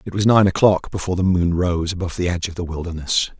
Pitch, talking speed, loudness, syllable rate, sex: 90 Hz, 250 wpm, -19 LUFS, 6.8 syllables/s, male